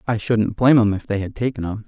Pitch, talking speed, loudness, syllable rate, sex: 110 Hz, 290 wpm, -19 LUFS, 6.4 syllables/s, male